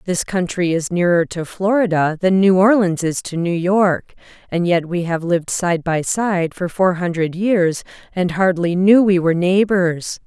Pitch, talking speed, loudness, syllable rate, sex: 180 Hz, 180 wpm, -17 LUFS, 4.4 syllables/s, female